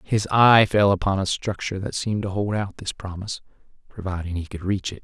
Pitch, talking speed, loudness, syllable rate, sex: 95 Hz, 215 wpm, -22 LUFS, 5.8 syllables/s, male